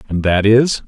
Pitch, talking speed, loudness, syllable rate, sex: 110 Hz, 205 wpm, -13 LUFS, 4.4 syllables/s, male